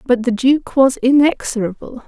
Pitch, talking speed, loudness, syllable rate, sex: 255 Hz, 145 wpm, -15 LUFS, 4.6 syllables/s, female